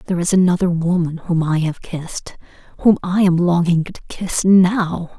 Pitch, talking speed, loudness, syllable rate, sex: 175 Hz, 160 wpm, -17 LUFS, 4.7 syllables/s, female